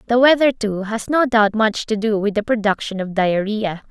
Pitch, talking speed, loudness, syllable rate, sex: 215 Hz, 215 wpm, -18 LUFS, 4.9 syllables/s, female